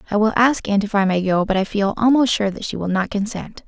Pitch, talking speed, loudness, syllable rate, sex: 210 Hz, 295 wpm, -19 LUFS, 5.9 syllables/s, female